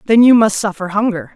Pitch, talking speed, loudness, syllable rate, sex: 210 Hz, 220 wpm, -13 LUFS, 5.9 syllables/s, female